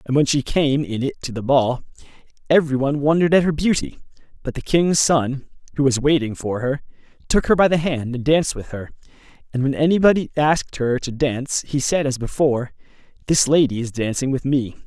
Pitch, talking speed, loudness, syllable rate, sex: 140 Hz, 200 wpm, -19 LUFS, 5.6 syllables/s, male